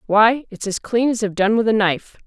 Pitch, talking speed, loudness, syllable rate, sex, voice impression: 215 Hz, 265 wpm, -18 LUFS, 5.5 syllables/s, female, very feminine, slightly young, slightly adult-like, slightly thin, tensed, slightly powerful, slightly dark, hard, clear, fluent, cool, very intellectual, slightly refreshing, very sincere, very calm, friendly, reassuring, unique, very wild, slightly lively, strict, slightly sharp, slightly modest